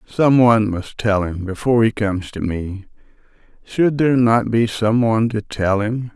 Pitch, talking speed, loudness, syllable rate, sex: 110 Hz, 185 wpm, -18 LUFS, 4.9 syllables/s, male